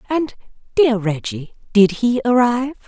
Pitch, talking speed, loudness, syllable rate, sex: 230 Hz, 105 wpm, -18 LUFS, 4.5 syllables/s, female